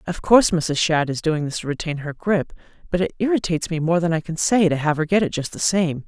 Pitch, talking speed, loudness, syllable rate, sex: 165 Hz, 275 wpm, -20 LUFS, 6.0 syllables/s, female